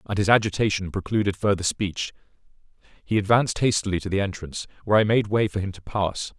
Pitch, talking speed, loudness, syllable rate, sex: 100 Hz, 190 wpm, -23 LUFS, 6.4 syllables/s, male